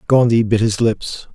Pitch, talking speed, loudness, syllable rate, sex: 110 Hz, 180 wpm, -16 LUFS, 4.4 syllables/s, male